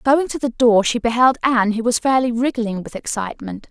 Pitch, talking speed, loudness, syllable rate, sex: 240 Hz, 210 wpm, -18 LUFS, 5.6 syllables/s, female